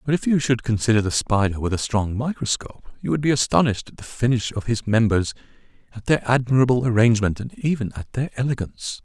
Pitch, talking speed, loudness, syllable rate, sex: 115 Hz, 200 wpm, -21 LUFS, 6.3 syllables/s, male